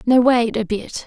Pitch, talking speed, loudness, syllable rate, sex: 235 Hz, 225 wpm, -18 LUFS, 4.2 syllables/s, female